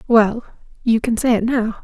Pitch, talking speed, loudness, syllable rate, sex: 230 Hz, 165 wpm, -18 LUFS, 5.0 syllables/s, female